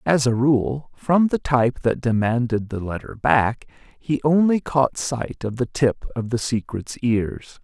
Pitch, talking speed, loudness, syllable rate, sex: 125 Hz, 175 wpm, -21 LUFS, 4.0 syllables/s, male